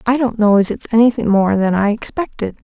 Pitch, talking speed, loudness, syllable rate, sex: 220 Hz, 220 wpm, -15 LUFS, 5.7 syllables/s, female